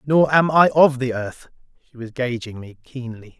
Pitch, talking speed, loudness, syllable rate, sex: 130 Hz, 195 wpm, -18 LUFS, 4.8 syllables/s, male